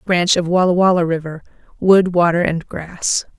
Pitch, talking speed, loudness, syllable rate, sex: 175 Hz, 140 wpm, -16 LUFS, 4.6 syllables/s, female